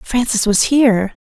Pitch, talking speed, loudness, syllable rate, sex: 230 Hz, 145 wpm, -14 LUFS, 4.4 syllables/s, female